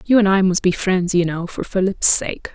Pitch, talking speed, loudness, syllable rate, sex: 190 Hz, 260 wpm, -17 LUFS, 5.0 syllables/s, female